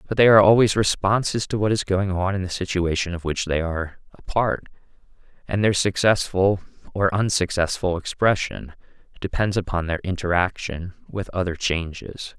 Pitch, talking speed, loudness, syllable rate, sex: 95 Hz, 155 wpm, -22 LUFS, 5.1 syllables/s, male